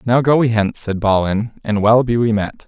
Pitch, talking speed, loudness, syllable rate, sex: 110 Hz, 245 wpm, -16 LUFS, 5.3 syllables/s, male